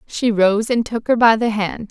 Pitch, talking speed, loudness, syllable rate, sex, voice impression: 220 Hz, 250 wpm, -17 LUFS, 4.4 syllables/s, female, feminine, slightly young, tensed, bright, soft, slightly halting, slightly cute, calm, friendly, unique, slightly sweet, kind, slightly modest